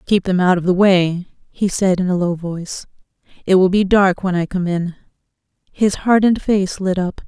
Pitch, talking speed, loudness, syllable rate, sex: 185 Hz, 205 wpm, -17 LUFS, 5.1 syllables/s, female